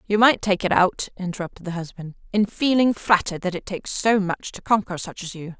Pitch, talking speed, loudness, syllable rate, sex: 195 Hz, 225 wpm, -22 LUFS, 5.7 syllables/s, female